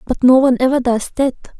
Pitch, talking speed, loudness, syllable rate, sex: 255 Hz, 225 wpm, -14 LUFS, 7.0 syllables/s, female